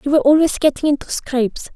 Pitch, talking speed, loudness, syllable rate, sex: 285 Hz, 205 wpm, -17 LUFS, 6.8 syllables/s, female